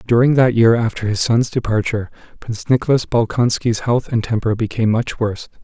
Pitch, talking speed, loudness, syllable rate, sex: 115 Hz, 170 wpm, -17 LUFS, 5.9 syllables/s, male